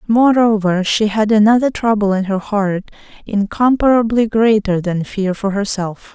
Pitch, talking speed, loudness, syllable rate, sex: 210 Hz, 135 wpm, -15 LUFS, 4.5 syllables/s, female